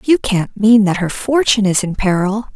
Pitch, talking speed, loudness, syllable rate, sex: 205 Hz, 210 wpm, -15 LUFS, 5.1 syllables/s, female